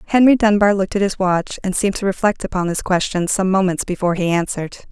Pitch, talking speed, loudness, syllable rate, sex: 190 Hz, 220 wpm, -18 LUFS, 6.5 syllables/s, female